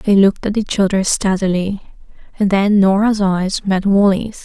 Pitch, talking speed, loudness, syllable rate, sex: 195 Hz, 160 wpm, -15 LUFS, 4.6 syllables/s, female